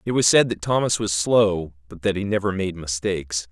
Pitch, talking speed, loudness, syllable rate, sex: 95 Hz, 220 wpm, -21 LUFS, 5.3 syllables/s, male